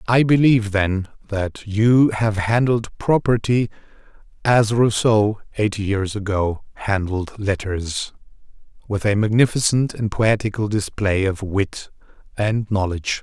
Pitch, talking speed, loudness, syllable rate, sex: 105 Hz, 115 wpm, -20 LUFS, 4.1 syllables/s, male